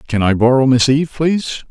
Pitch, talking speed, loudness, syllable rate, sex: 135 Hz, 210 wpm, -14 LUFS, 5.8 syllables/s, male